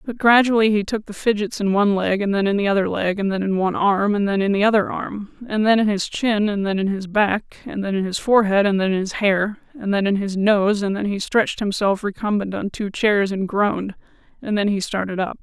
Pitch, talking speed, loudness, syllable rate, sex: 205 Hz, 260 wpm, -20 LUFS, 5.7 syllables/s, female